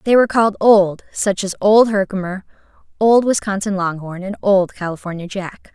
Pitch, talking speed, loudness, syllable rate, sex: 195 Hz, 155 wpm, -17 LUFS, 5.1 syllables/s, female